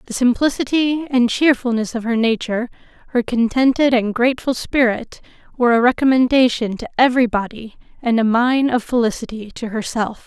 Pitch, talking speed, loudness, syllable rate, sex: 240 Hz, 145 wpm, -17 LUFS, 5.6 syllables/s, female